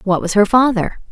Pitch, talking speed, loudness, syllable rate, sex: 210 Hz, 215 wpm, -15 LUFS, 5.4 syllables/s, female